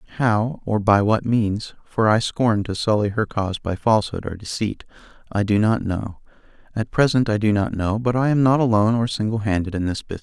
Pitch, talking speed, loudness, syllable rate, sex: 110 Hz, 205 wpm, -21 LUFS, 5.7 syllables/s, male